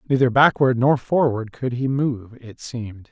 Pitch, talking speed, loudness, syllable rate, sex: 125 Hz, 175 wpm, -20 LUFS, 4.5 syllables/s, male